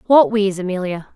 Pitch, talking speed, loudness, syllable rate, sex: 200 Hz, 155 wpm, -18 LUFS, 5.1 syllables/s, female